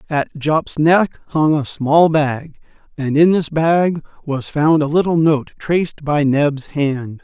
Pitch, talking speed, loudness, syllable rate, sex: 150 Hz, 165 wpm, -16 LUFS, 3.5 syllables/s, male